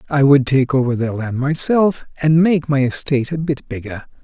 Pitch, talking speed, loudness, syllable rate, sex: 140 Hz, 200 wpm, -17 LUFS, 5.1 syllables/s, male